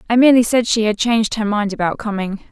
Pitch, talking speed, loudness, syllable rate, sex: 215 Hz, 240 wpm, -16 LUFS, 6.6 syllables/s, female